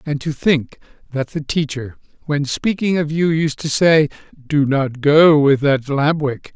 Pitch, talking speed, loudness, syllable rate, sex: 145 Hz, 185 wpm, -17 LUFS, 4.0 syllables/s, male